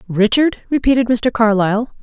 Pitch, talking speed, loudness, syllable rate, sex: 230 Hz, 120 wpm, -15 LUFS, 5.3 syllables/s, female